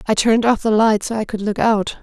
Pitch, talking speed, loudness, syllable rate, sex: 220 Hz, 295 wpm, -17 LUFS, 5.9 syllables/s, female